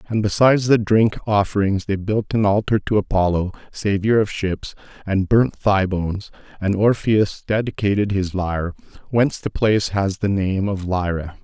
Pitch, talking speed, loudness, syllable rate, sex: 100 Hz, 165 wpm, -20 LUFS, 4.8 syllables/s, male